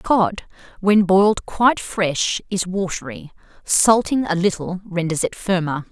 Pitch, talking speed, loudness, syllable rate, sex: 190 Hz, 130 wpm, -19 LUFS, 4.1 syllables/s, female